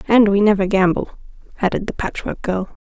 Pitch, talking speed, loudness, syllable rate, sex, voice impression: 200 Hz, 170 wpm, -18 LUFS, 5.6 syllables/s, female, very feminine, very young, relaxed, weak, slightly dark, soft, muffled, slightly halting, slightly raspy, cute, intellectual, refreshing, slightly sincere, slightly calm, friendly, slightly reassuring, elegant, slightly sweet, kind, very modest